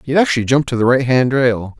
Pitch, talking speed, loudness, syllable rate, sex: 130 Hz, 235 wpm, -15 LUFS, 6.6 syllables/s, male